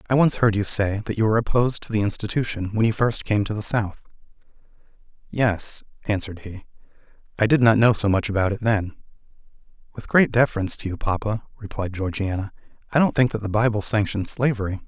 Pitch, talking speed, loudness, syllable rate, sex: 105 Hz, 190 wpm, -22 LUFS, 6.2 syllables/s, male